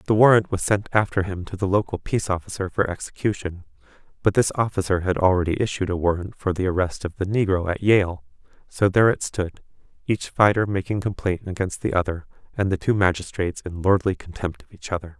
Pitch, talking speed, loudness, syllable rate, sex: 95 Hz, 195 wpm, -23 LUFS, 5.9 syllables/s, male